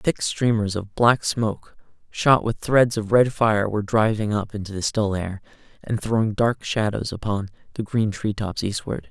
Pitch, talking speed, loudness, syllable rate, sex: 110 Hz, 180 wpm, -22 LUFS, 4.6 syllables/s, male